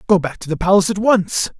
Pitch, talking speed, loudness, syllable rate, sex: 185 Hz, 265 wpm, -16 LUFS, 6.6 syllables/s, male